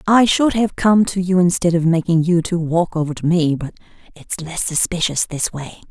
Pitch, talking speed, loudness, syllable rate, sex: 175 Hz, 215 wpm, -17 LUFS, 5.0 syllables/s, female